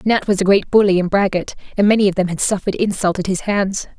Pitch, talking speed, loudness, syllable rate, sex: 195 Hz, 255 wpm, -17 LUFS, 6.4 syllables/s, female